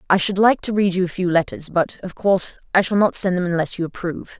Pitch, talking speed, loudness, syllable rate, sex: 185 Hz, 275 wpm, -19 LUFS, 6.2 syllables/s, female